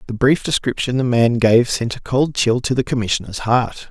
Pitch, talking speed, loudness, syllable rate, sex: 120 Hz, 215 wpm, -17 LUFS, 5.1 syllables/s, male